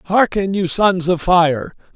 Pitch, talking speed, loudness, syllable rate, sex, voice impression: 180 Hz, 155 wpm, -16 LUFS, 3.9 syllables/s, male, very masculine, middle-aged, very thick, slightly relaxed, slightly weak, slightly dark, soft, muffled, fluent, raspy, very cool, intellectual, very refreshing, sincere, very calm, very mature, very friendly, very reassuring, unique, elegant, wild, very sweet, lively, kind, slightly intense